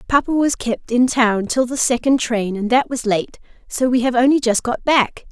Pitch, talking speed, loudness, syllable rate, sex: 245 Hz, 225 wpm, -17 LUFS, 4.7 syllables/s, female